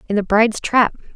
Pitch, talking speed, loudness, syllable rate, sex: 220 Hz, 205 wpm, -17 LUFS, 6.3 syllables/s, female